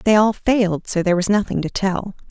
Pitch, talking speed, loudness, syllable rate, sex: 200 Hz, 235 wpm, -19 LUFS, 5.8 syllables/s, female